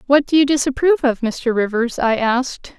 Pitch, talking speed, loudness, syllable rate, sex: 255 Hz, 195 wpm, -17 LUFS, 5.5 syllables/s, female